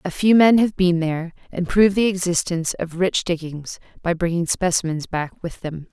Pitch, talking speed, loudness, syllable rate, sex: 175 Hz, 195 wpm, -20 LUFS, 5.2 syllables/s, female